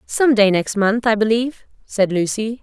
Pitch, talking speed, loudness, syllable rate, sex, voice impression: 220 Hz, 185 wpm, -17 LUFS, 4.7 syllables/s, female, feminine, adult-like, tensed, powerful, clear, fluent, intellectual, friendly, lively, intense